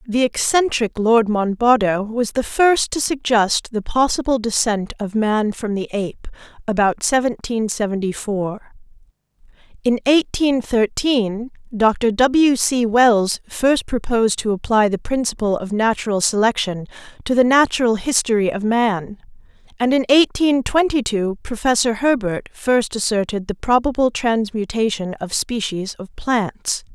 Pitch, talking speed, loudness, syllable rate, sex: 230 Hz, 130 wpm, -18 LUFS, 4.2 syllables/s, female